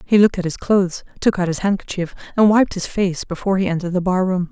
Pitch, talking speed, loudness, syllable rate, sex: 185 Hz, 240 wpm, -19 LUFS, 6.7 syllables/s, female